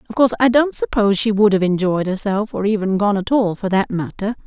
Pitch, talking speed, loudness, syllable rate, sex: 205 Hz, 230 wpm, -17 LUFS, 6.1 syllables/s, female